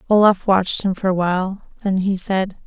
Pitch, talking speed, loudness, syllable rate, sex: 190 Hz, 205 wpm, -19 LUFS, 5.5 syllables/s, female